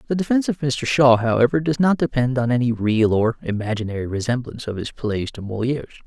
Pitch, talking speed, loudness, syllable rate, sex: 125 Hz, 200 wpm, -20 LUFS, 6.2 syllables/s, male